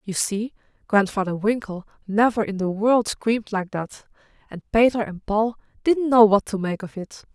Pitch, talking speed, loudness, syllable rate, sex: 215 Hz, 180 wpm, -22 LUFS, 4.8 syllables/s, female